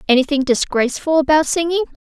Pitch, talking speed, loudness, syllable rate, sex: 290 Hz, 120 wpm, -16 LUFS, 6.8 syllables/s, female